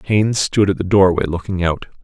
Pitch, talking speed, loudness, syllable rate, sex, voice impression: 95 Hz, 205 wpm, -16 LUFS, 5.6 syllables/s, male, very masculine, very adult-like, middle-aged, very thick, slightly relaxed, slightly weak, slightly dark, slightly soft, muffled, fluent, very cool, intellectual, sincere, calm, very mature, very friendly, very reassuring, slightly unique, slightly elegant, slightly strict, slightly sharp